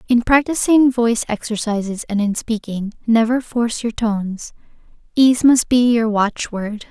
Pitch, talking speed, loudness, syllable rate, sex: 230 Hz, 140 wpm, -17 LUFS, 4.6 syllables/s, female